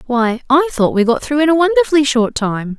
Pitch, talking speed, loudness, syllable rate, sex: 265 Hz, 235 wpm, -14 LUFS, 5.5 syllables/s, female